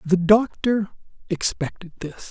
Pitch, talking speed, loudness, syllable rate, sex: 190 Hz, 105 wpm, -21 LUFS, 4.1 syllables/s, male